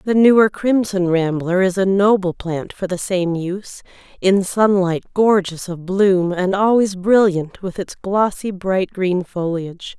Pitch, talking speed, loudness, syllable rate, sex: 190 Hz, 155 wpm, -18 LUFS, 4.1 syllables/s, female